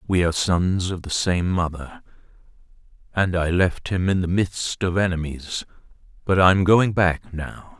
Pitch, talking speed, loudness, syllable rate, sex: 90 Hz, 160 wpm, -21 LUFS, 4.4 syllables/s, male